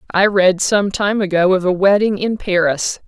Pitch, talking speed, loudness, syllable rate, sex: 190 Hz, 195 wpm, -15 LUFS, 4.6 syllables/s, female